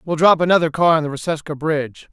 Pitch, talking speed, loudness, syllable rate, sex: 155 Hz, 225 wpm, -17 LUFS, 6.5 syllables/s, male